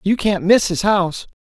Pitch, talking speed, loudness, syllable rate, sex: 190 Hz, 205 wpm, -17 LUFS, 5.0 syllables/s, male